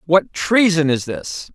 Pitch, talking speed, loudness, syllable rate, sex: 155 Hz, 155 wpm, -17 LUFS, 3.6 syllables/s, male